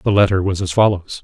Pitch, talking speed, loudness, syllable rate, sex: 95 Hz, 245 wpm, -16 LUFS, 5.9 syllables/s, male